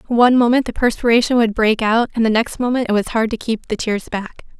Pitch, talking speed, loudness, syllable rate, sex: 230 Hz, 250 wpm, -17 LUFS, 5.9 syllables/s, female